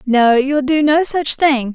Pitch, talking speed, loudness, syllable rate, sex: 275 Hz, 205 wpm, -14 LUFS, 3.6 syllables/s, female